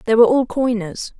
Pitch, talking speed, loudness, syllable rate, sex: 230 Hz, 200 wpm, -17 LUFS, 5.8 syllables/s, female